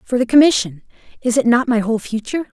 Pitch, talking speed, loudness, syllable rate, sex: 240 Hz, 210 wpm, -16 LUFS, 6.8 syllables/s, female